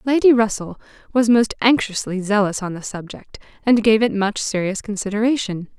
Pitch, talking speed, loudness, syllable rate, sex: 215 Hz, 155 wpm, -19 LUFS, 5.3 syllables/s, female